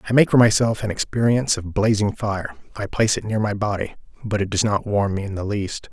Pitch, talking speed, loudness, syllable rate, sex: 105 Hz, 245 wpm, -21 LUFS, 6.0 syllables/s, male